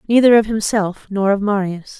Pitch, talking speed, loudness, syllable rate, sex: 205 Hz, 180 wpm, -16 LUFS, 5.1 syllables/s, female